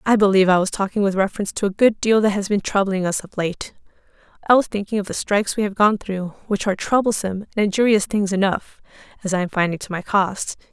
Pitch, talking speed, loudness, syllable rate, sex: 200 Hz, 235 wpm, -20 LUFS, 6.5 syllables/s, female